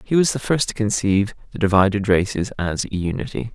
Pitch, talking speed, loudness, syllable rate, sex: 105 Hz, 205 wpm, -20 LUFS, 5.9 syllables/s, male